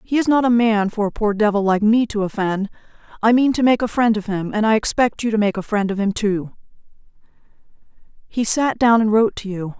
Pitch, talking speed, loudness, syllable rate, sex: 215 Hz, 240 wpm, -18 LUFS, 5.7 syllables/s, female